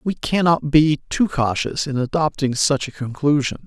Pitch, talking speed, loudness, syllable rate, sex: 145 Hz, 165 wpm, -19 LUFS, 4.7 syllables/s, male